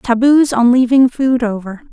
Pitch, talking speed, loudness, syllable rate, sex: 245 Hz, 155 wpm, -12 LUFS, 4.4 syllables/s, female